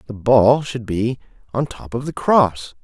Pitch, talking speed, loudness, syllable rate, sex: 120 Hz, 190 wpm, -18 LUFS, 4.0 syllables/s, male